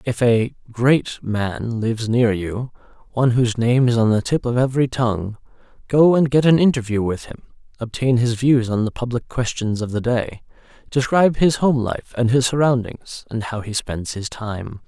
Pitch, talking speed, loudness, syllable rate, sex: 120 Hz, 190 wpm, -19 LUFS, 4.9 syllables/s, male